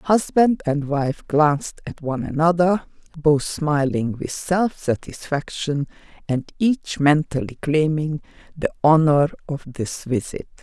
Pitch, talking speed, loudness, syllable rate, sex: 155 Hz, 120 wpm, -21 LUFS, 3.9 syllables/s, female